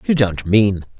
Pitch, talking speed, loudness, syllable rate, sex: 110 Hz, 180 wpm, -17 LUFS, 4.2 syllables/s, male